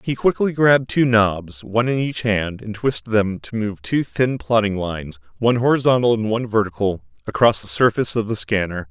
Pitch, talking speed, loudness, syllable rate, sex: 110 Hz, 195 wpm, -19 LUFS, 5.5 syllables/s, male